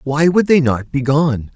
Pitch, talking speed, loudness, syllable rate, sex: 145 Hz, 230 wpm, -15 LUFS, 4.2 syllables/s, male